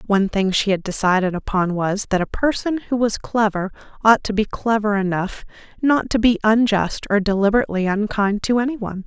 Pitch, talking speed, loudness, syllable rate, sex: 210 Hz, 185 wpm, -19 LUFS, 5.6 syllables/s, female